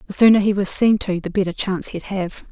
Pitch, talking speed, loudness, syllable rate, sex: 195 Hz, 265 wpm, -18 LUFS, 6.0 syllables/s, female